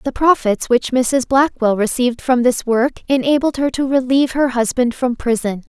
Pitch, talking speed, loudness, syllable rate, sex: 250 Hz, 175 wpm, -16 LUFS, 5.0 syllables/s, female